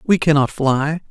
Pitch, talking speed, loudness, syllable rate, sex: 150 Hz, 165 wpm, -17 LUFS, 4.3 syllables/s, male